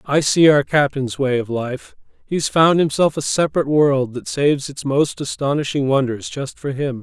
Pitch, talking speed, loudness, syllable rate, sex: 140 Hz, 190 wpm, -18 LUFS, 4.8 syllables/s, male